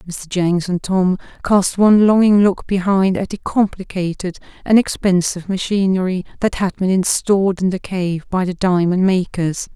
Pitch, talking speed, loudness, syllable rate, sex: 185 Hz, 160 wpm, -17 LUFS, 4.8 syllables/s, female